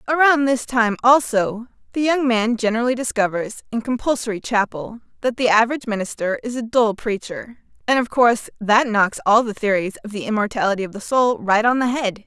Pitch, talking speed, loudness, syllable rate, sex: 230 Hz, 185 wpm, -19 LUFS, 5.7 syllables/s, female